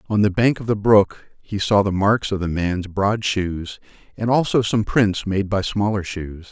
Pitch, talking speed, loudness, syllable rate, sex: 100 Hz, 210 wpm, -20 LUFS, 4.3 syllables/s, male